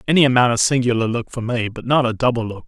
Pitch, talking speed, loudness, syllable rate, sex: 120 Hz, 270 wpm, -18 LUFS, 6.8 syllables/s, male